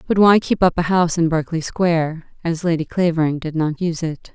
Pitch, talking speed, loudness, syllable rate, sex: 165 Hz, 220 wpm, -19 LUFS, 6.0 syllables/s, female